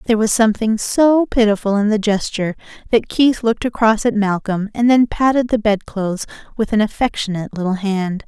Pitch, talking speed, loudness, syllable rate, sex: 215 Hz, 175 wpm, -17 LUFS, 5.7 syllables/s, female